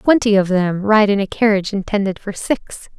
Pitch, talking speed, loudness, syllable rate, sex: 205 Hz, 200 wpm, -17 LUFS, 5.2 syllables/s, female